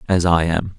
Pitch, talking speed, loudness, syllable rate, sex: 85 Hz, 230 wpm, -18 LUFS, 4.8 syllables/s, male